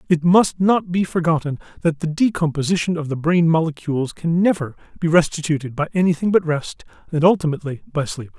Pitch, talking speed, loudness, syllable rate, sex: 160 Hz, 170 wpm, -19 LUFS, 5.9 syllables/s, male